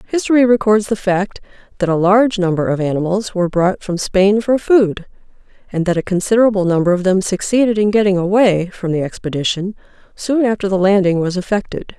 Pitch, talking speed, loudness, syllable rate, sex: 195 Hz, 180 wpm, -15 LUFS, 5.8 syllables/s, female